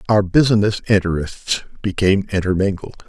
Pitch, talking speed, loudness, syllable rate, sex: 100 Hz, 95 wpm, -18 LUFS, 5.5 syllables/s, male